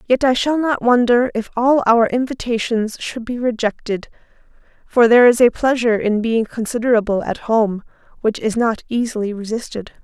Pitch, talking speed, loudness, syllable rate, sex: 235 Hz, 160 wpm, -17 LUFS, 5.1 syllables/s, female